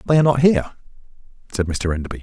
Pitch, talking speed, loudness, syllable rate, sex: 115 Hz, 190 wpm, -19 LUFS, 8.5 syllables/s, male